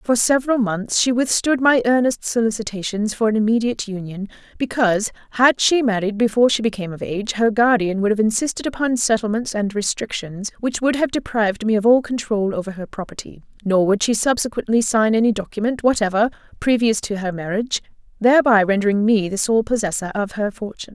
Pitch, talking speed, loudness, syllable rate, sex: 220 Hz, 180 wpm, -19 LUFS, 6.0 syllables/s, female